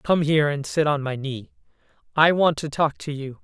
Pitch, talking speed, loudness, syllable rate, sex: 150 Hz, 225 wpm, -22 LUFS, 5.1 syllables/s, female